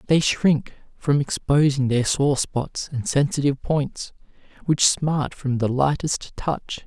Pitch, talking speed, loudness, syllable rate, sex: 140 Hz, 140 wpm, -22 LUFS, 3.8 syllables/s, male